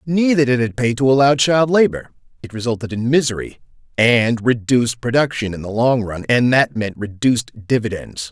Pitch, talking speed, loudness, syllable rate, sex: 120 Hz, 175 wpm, -17 LUFS, 5.2 syllables/s, male